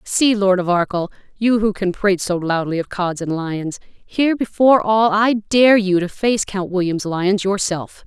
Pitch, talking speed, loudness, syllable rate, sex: 195 Hz, 195 wpm, -18 LUFS, 4.5 syllables/s, female